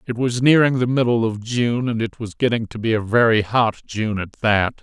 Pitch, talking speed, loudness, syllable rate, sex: 115 Hz, 235 wpm, -19 LUFS, 4.9 syllables/s, male